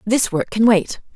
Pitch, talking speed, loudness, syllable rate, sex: 210 Hz, 210 wpm, -17 LUFS, 4.3 syllables/s, female